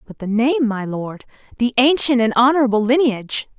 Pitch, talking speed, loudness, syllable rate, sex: 240 Hz, 150 wpm, -17 LUFS, 5.4 syllables/s, female